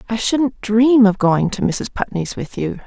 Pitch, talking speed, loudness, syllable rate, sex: 215 Hz, 210 wpm, -17 LUFS, 4.2 syllables/s, female